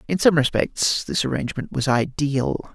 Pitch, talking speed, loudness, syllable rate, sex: 140 Hz, 155 wpm, -21 LUFS, 4.6 syllables/s, male